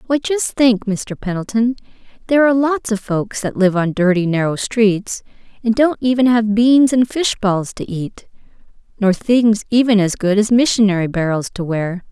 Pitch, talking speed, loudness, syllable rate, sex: 215 Hz, 180 wpm, -16 LUFS, 4.7 syllables/s, female